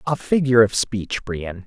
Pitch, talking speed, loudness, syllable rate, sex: 115 Hz, 180 wpm, -20 LUFS, 4.5 syllables/s, male